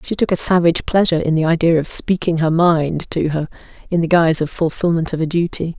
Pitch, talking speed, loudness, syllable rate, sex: 165 Hz, 230 wpm, -17 LUFS, 6.1 syllables/s, female